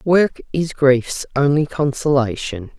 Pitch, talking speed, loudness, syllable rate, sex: 140 Hz, 110 wpm, -18 LUFS, 3.7 syllables/s, female